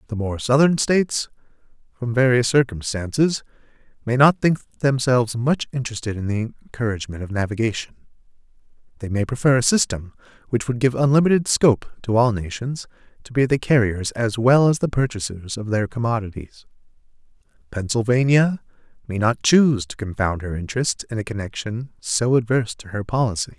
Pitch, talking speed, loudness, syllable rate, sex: 120 Hz, 150 wpm, -21 LUFS, 5.5 syllables/s, male